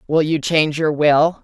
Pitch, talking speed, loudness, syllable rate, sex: 155 Hz, 210 wpm, -17 LUFS, 4.7 syllables/s, female